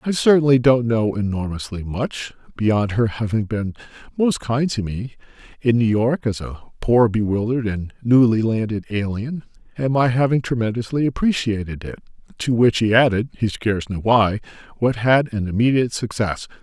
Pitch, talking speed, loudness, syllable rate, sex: 115 Hz, 155 wpm, -20 LUFS, 5.1 syllables/s, male